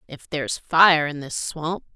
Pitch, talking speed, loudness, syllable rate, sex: 155 Hz, 185 wpm, -21 LUFS, 4.1 syllables/s, female